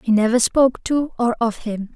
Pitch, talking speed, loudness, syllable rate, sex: 235 Hz, 215 wpm, -19 LUFS, 5.3 syllables/s, female